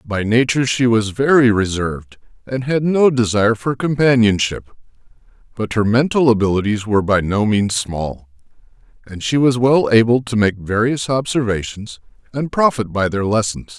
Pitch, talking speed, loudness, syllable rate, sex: 115 Hz, 150 wpm, -16 LUFS, 5.0 syllables/s, male